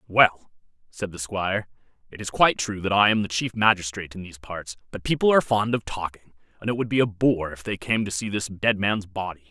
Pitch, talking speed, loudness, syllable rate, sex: 100 Hz, 240 wpm, -24 LUFS, 5.9 syllables/s, male